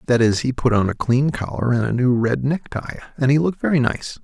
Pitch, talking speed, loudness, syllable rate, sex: 125 Hz, 255 wpm, -20 LUFS, 5.7 syllables/s, male